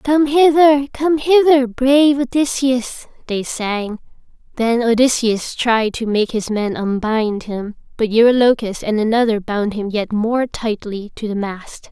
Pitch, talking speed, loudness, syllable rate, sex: 235 Hz, 145 wpm, -16 LUFS, 4.0 syllables/s, female